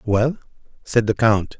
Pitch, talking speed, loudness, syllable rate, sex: 110 Hz, 150 wpm, -19 LUFS, 3.9 syllables/s, male